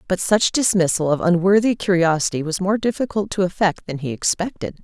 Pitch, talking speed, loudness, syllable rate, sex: 185 Hz, 175 wpm, -19 LUFS, 5.7 syllables/s, female